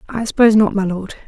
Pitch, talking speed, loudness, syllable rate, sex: 210 Hz, 235 wpm, -15 LUFS, 7.0 syllables/s, female